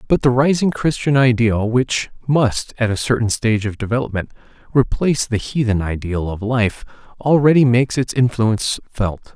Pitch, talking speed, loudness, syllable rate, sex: 120 Hz, 155 wpm, -18 LUFS, 5.1 syllables/s, male